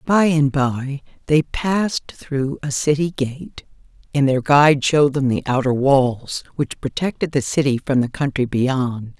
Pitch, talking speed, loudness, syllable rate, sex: 140 Hz, 165 wpm, -19 LUFS, 4.2 syllables/s, female